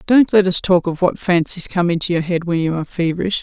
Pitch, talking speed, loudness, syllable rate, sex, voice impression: 175 Hz, 265 wpm, -17 LUFS, 6.1 syllables/s, female, feminine, adult-like, slightly intellectual, slightly calm, slightly sharp